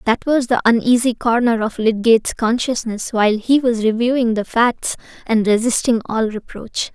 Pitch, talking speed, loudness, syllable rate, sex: 230 Hz, 155 wpm, -17 LUFS, 4.8 syllables/s, female